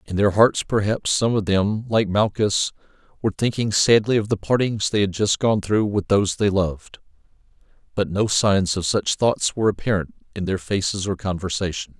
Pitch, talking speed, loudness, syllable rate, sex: 100 Hz, 185 wpm, -21 LUFS, 5.1 syllables/s, male